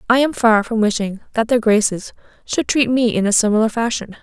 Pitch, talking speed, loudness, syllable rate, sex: 225 Hz, 215 wpm, -17 LUFS, 5.6 syllables/s, female